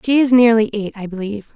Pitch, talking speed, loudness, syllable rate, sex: 220 Hz, 230 wpm, -16 LUFS, 6.6 syllables/s, female